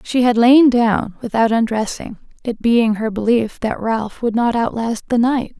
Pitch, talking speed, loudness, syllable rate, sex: 230 Hz, 180 wpm, -17 LUFS, 4.3 syllables/s, female